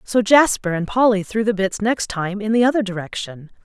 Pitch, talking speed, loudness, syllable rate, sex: 210 Hz, 215 wpm, -19 LUFS, 5.2 syllables/s, female